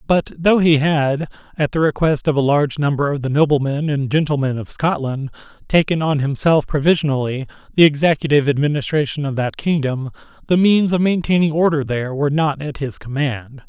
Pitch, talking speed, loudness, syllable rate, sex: 145 Hz, 170 wpm, -18 LUFS, 5.6 syllables/s, male